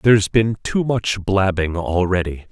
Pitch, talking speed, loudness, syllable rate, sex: 100 Hz, 145 wpm, -19 LUFS, 4.2 syllables/s, male